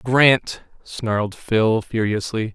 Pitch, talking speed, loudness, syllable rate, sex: 115 Hz, 95 wpm, -20 LUFS, 3.1 syllables/s, male